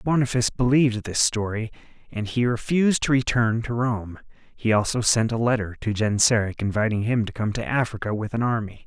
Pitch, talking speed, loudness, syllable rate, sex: 115 Hz, 185 wpm, -23 LUFS, 5.6 syllables/s, male